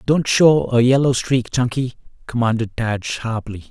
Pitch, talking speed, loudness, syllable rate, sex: 120 Hz, 145 wpm, -18 LUFS, 4.4 syllables/s, male